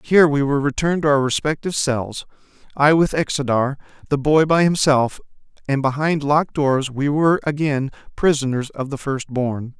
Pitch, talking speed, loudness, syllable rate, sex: 145 Hz, 165 wpm, -19 LUFS, 5.2 syllables/s, male